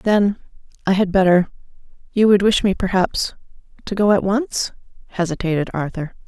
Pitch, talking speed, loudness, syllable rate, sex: 195 Hz, 115 wpm, -19 LUFS, 5.1 syllables/s, female